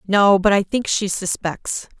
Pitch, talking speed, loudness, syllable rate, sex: 195 Hz, 180 wpm, -19 LUFS, 4.0 syllables/s, female